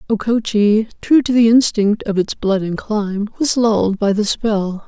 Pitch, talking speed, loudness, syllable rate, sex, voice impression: 215 Hz, 185 wpm, -16 LUFS, 4.5 syllables/s, female, feminine, adult-like, soft, friendly, reassuring, slightly sweet, kind